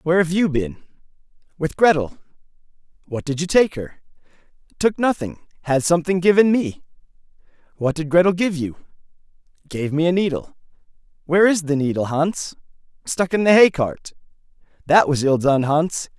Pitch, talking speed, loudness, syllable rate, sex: 160 Hz, 150 wpm, -19 LUFS, 5.3 syllables/s, male